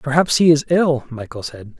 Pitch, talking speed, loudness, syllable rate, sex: 140 Hz, 200 wpm, -16 LUFS, 4.9 syllables/s, male